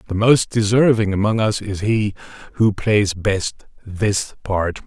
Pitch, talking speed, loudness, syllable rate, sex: 105 Hz, 150 wpm, -18 LUFS, 3.8 syllables/s, male